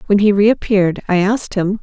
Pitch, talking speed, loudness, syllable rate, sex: 200 Hz, 195 wpm, -15 LUFS, 5.6 syllables/s, female